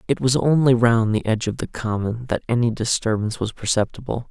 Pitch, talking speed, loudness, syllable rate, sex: 115 Hz, 195 wpm, -21 LUFS, 5.9 syllables/s, male